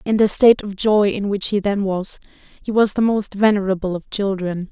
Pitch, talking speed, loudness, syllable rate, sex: 200 Hz, 215 wpm, -18 LUFS, 5.3 syllables/s, female